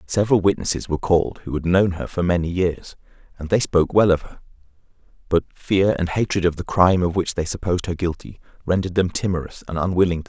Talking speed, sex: 220 wpm, male